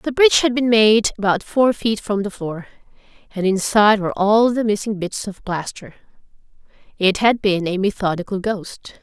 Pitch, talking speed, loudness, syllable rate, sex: 210 Hz, 175 wpm, -18 LUFS, 4.9 syllables/s, female